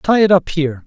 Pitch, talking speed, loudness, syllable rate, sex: 160 Hz, 280 wpm, -15 LUFS, 6.0 syllables/s, male